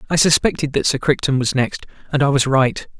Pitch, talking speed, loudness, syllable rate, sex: 140 Hz, 220 wpm, -17 LUFS, 5.6 syllables/s, male